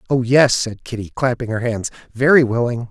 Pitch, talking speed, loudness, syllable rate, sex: 120 Hz, 185 wpm, -17 LUFS, 5.3 syllables/s, male